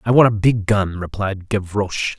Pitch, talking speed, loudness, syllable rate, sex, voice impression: 100 Hz, 195 wpm, -19 LUFS, 4.8 syllables/s, male, masculine, adult-like, tensed, powerful, clear, cool, friendly, wild, lively, slightly strict